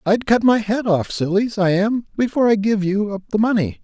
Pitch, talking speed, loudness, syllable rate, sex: 210 Hz, 235 wpm, -18 LUFS, 5.4 syllables/s, male